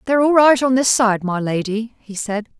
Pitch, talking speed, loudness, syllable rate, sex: 230 Hz, 230 wpm, -17 LUFS, 5.1 syllables/s, female